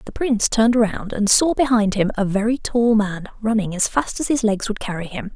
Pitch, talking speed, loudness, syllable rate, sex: 220 Hz, 235 wpm, -19 LUFS, 5.4 syllables/s, female